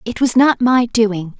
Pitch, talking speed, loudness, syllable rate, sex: 230 Hz, 215 wpm, -14 LUFS, 3.9 syllables/s, female